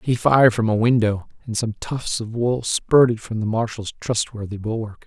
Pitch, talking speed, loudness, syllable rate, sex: 110 Hz, 190 wpm, -21 LUFS, 4.9 syllables/s, male